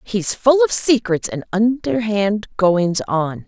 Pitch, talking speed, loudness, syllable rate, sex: 200 Hz, 140 wpm, -17 LUFS, 3.4 syllables/s, female